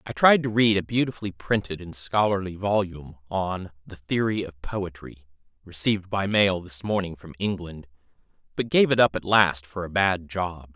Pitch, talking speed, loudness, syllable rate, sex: 95 Hz, 175 wpm, -24 LUFS, 5.0 syllables/s, male